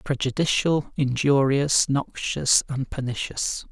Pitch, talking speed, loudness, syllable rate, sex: 140 Hz, 80 wpm, -23 LUFS, 3.7 syllables/s, male